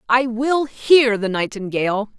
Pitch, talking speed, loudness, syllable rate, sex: 235 Hz, 135 wpm, -18 LUFS, 4.2 syllables/s, female